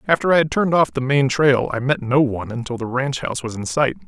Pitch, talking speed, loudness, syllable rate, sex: 135 Hz, 280 wpm, -19 LUFS, 6.4 syllables/s, male